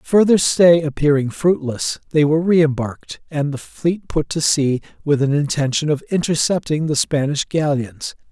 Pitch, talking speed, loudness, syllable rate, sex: 150 Hz, 150 wpm, -18 LUFS, 4.6 syllables/s, male